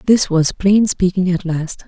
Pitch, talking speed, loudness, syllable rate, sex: 185 Hz, 190 wpm, -16 LUFS, 4.1 syllables/s, female